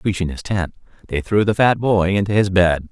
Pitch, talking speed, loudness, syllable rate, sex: 95 Hz, 225 wpm, -18 LUFS, 5.3 syllables/s, male